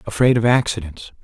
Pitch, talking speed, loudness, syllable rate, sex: 105 Hz, 145 wpm, -18 LUFS, 6.1 syllables/s, male